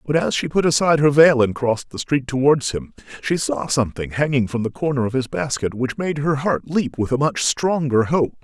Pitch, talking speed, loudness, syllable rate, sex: 135 Hz, 235 wpm, -19 LUFS, 5.4 syllables/s, male